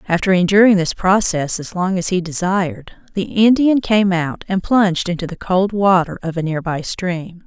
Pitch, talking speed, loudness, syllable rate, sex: 185 Hz, 195 wpm, -17 LUFS, 4.8 syllables/s, female